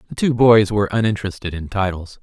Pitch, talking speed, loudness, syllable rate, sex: 105 Hz, 190 wpm, -18 LUFS, 6.5 syllables/s, male